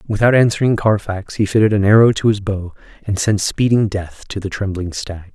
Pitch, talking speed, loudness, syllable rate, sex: 105 Hz, 200 wpm, -16 LUFS, 5.3 syllables/s, male